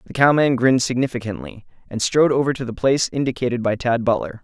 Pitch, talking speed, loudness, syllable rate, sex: 125 Hz, 190 wpm, -19 LUFS, 6.7 syllables/s, male